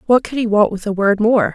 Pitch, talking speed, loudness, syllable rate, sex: 215 Hz, 310 wpm, -16 LUFS, 5.8 syllables/s, female